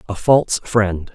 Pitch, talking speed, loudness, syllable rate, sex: 105 Hz, 160 wpm, -17 LUFS, 4.3 syllables/s, male